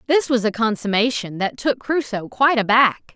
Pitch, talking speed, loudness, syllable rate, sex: 235 Hz, 170 wpm, -19 LUFS, 5.1 syllables/s, female